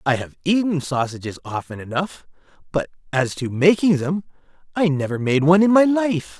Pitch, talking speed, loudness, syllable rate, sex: 160 Hz, 170 wpm, -20 LUFS, 5.2 syllables/s, male